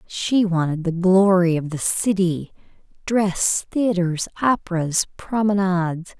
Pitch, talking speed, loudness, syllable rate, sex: 185 Hz, 95 wpm, -20 LUFS, 3.8 syllables/s, female